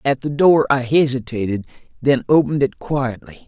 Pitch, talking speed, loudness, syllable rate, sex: 130 Hz, 155 wpm, -18 LUFS, 5.2 syllables/s, male